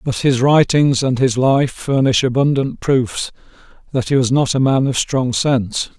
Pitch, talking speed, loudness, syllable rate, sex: 130 Hz, 180 wpm, -16 LUFS, 4.4 syllables/s, male